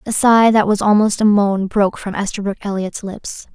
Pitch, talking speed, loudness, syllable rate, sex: 205 Hz, 205 wpm, -16 LUFS, 5.0 syllables/s, female